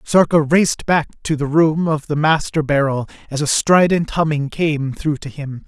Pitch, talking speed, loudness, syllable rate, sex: 150 Hz, 190 wpm, -17 LUFS, 4.5 syllables/s, male